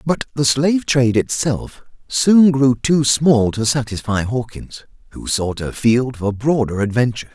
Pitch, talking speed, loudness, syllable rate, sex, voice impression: 125 Hz, 155 wpm, -17 LUFS, 4.4 syllables/s, male, masculine, adult-like, tensed, powerful, clear, fluent, intellectual, calm, friendly, reassuring, slightly wild, lively, kind